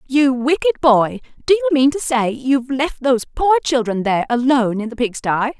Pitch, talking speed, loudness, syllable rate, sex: 265 Hz, 195 wpm, -17 LUFS, 5.6 syllables/s, female